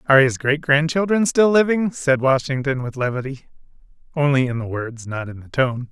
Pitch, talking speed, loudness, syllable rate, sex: 140 Hz, 195 wpm, -19 LUFS, 5.4 syllables/s, male